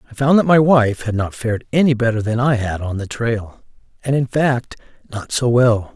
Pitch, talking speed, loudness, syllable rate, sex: 120 Hz, 220 wpm, -17 LUFS, 5.1 syllables/s, male